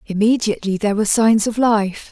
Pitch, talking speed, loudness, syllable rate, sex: 215 Hz, 170 wpm, -17 LUFS, 6.0 syllables/s, female